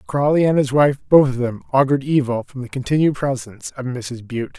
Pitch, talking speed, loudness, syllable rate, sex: 135 Hz, 210 wpm, -19 LUFS, 5.7 syllables/s, male